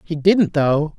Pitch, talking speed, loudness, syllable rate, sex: 160 Hz, 185 wpm, -17 LUFS, 3.4 syllables/s, female